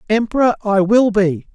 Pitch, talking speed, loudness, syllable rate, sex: 210 Hz, 155 wpm, -15 LUFS, 4.7 syllables/s, male